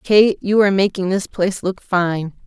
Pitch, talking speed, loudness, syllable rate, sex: 190 Hz, 195 wpm, -18 LUFS, 4.9 syllables/s, female